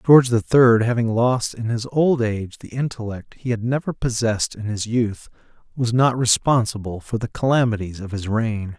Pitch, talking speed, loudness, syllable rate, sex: 115 Hz, 185 wpm, -20 LUFS, 5.1 syllables/s, male